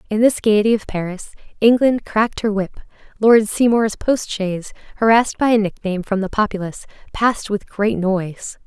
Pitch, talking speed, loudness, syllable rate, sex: 210 Hz, 165 wpm, -18 LUFS, 5.4 syllables/s, female